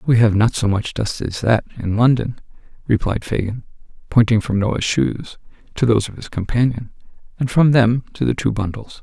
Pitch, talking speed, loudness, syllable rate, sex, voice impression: 110 Hz, 185 wpm, -18 LUFS, 5.0 syllables/s, male, very masculine, very adult-like, middle-aged, very thick, very relaxed, powerful, very dark, hard, very muffled, fluent, raspy, very cool, very intellectual, very sincere, very calm, very mature, friendly, reassuring, very unique, elegant, very sweet, very kind, slightly modest